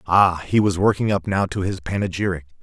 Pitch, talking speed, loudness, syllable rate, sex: 95 Hz, 205 wpm, -20 LUFS, 5.6 syllables/s, male